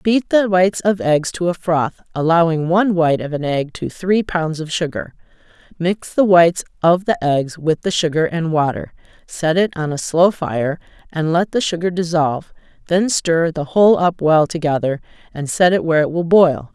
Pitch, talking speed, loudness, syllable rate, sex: 170 Hz, 195 wpm, -17 LUFS, 5.0 syllables/s, female